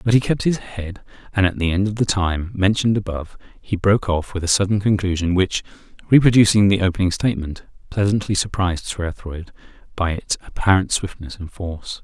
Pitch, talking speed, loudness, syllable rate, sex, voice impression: 95 Hz, 180 wpm, -20 LUFS, 6.0 syllables/s, male, very masculine, very adult-like, middle-aged, very thick, slightly relaxed, very powerful, bright, soft, very muffled, fluent, slightly raspy, very cool, very intellectual, slightly refreshing, sincere, very calm, very mature, friendly, very reassuring, unique, very elegant, slightly wild, very sweet, slightly lively, very kind, modest